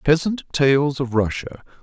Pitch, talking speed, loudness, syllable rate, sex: 140 Hz, 130 wpm, -20 LUFS, 4.1 syllables/s, male